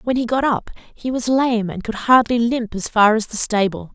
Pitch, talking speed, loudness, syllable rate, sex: 230 Hz, 245 wpm, -18 LUFS, 4.9 syllables/s, female